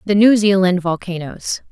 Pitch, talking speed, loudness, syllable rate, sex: 190 Hz, 140 wpm, -16 LUFS, 4.5 syllables/s, female